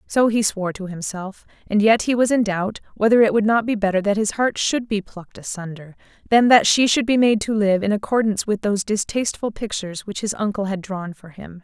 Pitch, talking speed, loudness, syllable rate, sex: 210 Hz, 225 wpm, -20 LUFS, 5.8 syllables/s, female